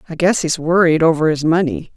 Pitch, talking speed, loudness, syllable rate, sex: 165 Hz, 245 wpm, -15 LUFS, 6.2 syllables/s, female